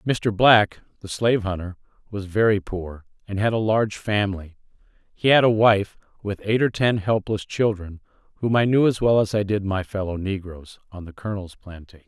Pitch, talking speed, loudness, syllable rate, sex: 100 Hz, 190 wpm, -22 LUFS, 5.2 syllables/s, male